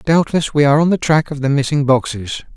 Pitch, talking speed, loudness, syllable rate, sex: 145 Hz, 235 wpm, -15 LUFS, 6.0 syllables/s, male